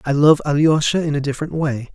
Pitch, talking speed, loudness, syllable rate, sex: 145 Hz, 215 wpm, -17 LUFS, 6.2 syllables/s, male